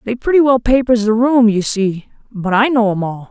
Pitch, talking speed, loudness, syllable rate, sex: 225 Hz, 235 wpm, -14 LUFS, 5.0 syllables/s, female